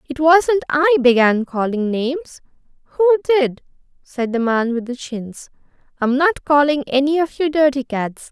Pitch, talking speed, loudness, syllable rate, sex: 280 Hz, 160 wpm, -17 LUFS, 4.7 syllables/s, female